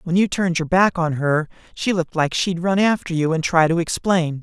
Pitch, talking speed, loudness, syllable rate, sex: 170 Hz, 245 wpm, -19 LUFS, 5.4 syllables/s, male